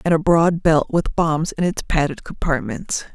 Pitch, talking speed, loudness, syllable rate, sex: 160 Hz, 190 wpm, -19 LUFS, 4.4 syllables/s, female